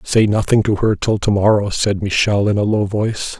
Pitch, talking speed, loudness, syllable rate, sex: 105 Hz, 230 wpm, -16 LUFS, 5.2 syllables/s, male